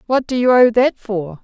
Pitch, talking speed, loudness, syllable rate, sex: 230 Hz, 250 wpm, -15 LUFS, 4.7 syllables/s, female